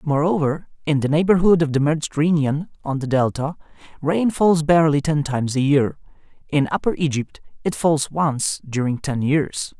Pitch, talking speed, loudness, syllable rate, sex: 150 Hz, 160 wpm, -20 LUFS, 5.1 syllables/s, male